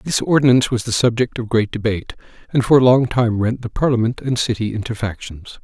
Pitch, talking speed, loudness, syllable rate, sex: 115 Hz, 215 wpm, -18 LUFS, 5.9 syllables/s, male